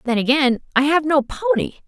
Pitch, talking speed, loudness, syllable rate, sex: 285 Hz, 190 wpm, -18 LUFS, 5.0 syllables/s, female